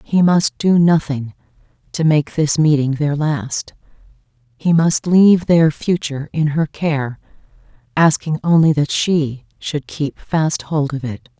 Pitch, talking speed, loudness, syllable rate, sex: 150 Hz, 145 wpm, -17 LUFS, 3.9 syllables/s, female